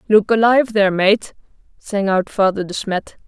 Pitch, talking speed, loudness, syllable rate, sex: 205 Hz, 165 wpm, -17 LUFS, 5.0 syllables/s, female